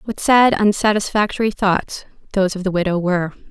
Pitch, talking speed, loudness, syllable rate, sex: 200 Hz, 155 wpm, -17 LUFS, 5.5 syllables/s, female